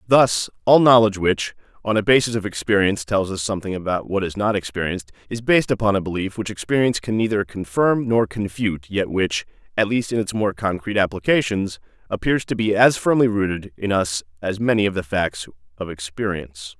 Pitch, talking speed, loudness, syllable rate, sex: 100 Hz, 190 wpm, -20 LUFS, 5.8 syllables/s, male